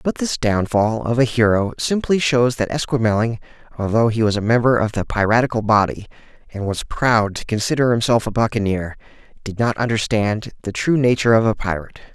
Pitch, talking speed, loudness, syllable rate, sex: 115 Hz, 180 wpm, -18 LUFS, 5.6 syllables/s, male